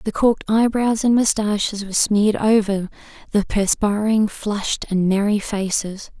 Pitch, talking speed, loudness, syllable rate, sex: 210 Hz, 135 wpm, -19 LUFS, 4.7 syllables/s, female